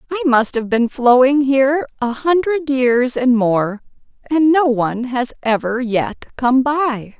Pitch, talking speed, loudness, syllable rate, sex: 260 Hz, 160 wpm, -16 LUFS, 3.9 syllables/s, female